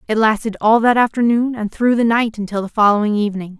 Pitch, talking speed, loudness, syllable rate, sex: 220 Hz, 215 wpm, -16 LUFS, 6.3 syllables/s, female